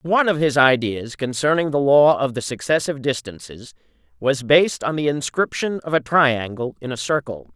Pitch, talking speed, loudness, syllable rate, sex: 140 Hz, 175 wpm, -19 LUFS, 5.2 syllables/s, male